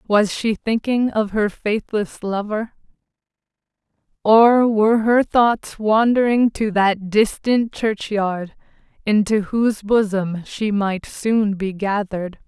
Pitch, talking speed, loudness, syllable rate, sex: 210 Hz, 115 wpm, -19 LUFS, 3.6 syllables/s, female